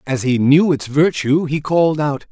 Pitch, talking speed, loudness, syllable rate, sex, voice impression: 145 Hz, 210 wpm, -16 LUFS, 4.6 syllables/s, male, masculine, adult-like, refreshing, friendly, slightly elegant